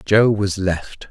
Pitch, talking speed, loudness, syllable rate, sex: 100 Hz, 165 wpm, -19 LUFS, 3.0 syllables/s, male